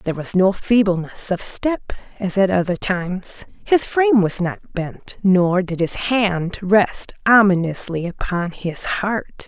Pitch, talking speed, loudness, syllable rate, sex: 190 Hz, 150 wpm, -19 LUFS, 4.0 syllables/s, female